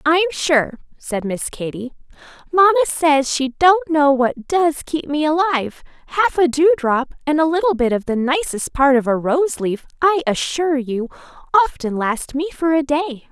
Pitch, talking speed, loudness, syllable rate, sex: 295 Hz, 175 wpm, -18 LUFS, 4.5 syllables/s, female